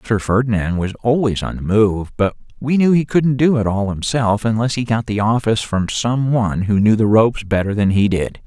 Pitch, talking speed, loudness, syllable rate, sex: 110 Hz, 225 wpm, -17 LUFS, 5.3 syllables/s, male